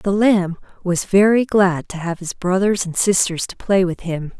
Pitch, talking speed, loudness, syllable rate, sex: 190 Hz, 205 wpm, -18 LUFS, 4.5 syllables/s, female